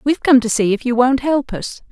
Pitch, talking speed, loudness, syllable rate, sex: 250 Hz, 280 wpm, -16 LUFS, 5.7 syllables/s, female